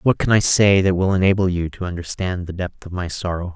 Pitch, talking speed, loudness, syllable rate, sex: 90 Hz, 255 wpm, -19 LUFS, 5.7 syllables/s, male